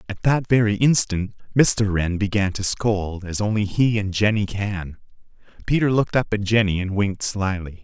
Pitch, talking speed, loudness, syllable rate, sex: 105 Hz, 175 wpm, -21 LUFS, 4.9 syllables/s, male